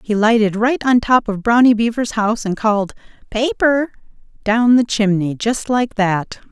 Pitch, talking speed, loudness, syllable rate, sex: 225 Hz, 155 wpm, -16 LUFS, 4.6 syllables/s, female